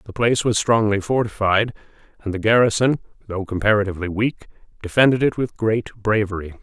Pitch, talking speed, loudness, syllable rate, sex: 105 Hz, 145 wpm, -20 LUFS, 6.0 syllables/s, male